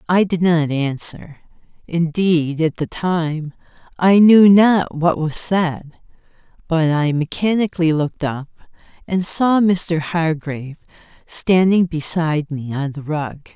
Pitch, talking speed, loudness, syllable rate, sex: 165 Hz, 130 wpm, -17 LUFS, 3.9 syllables/s, female